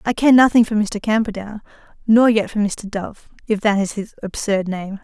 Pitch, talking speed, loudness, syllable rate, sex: 210 Hz, 190 wpm, -18 LUFS, 5.0 syllables/s, female